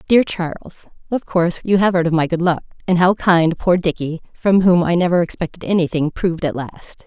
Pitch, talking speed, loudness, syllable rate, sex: 175 Hz, 185 wpm, -17 LUFS, 5.4 syllables/s, female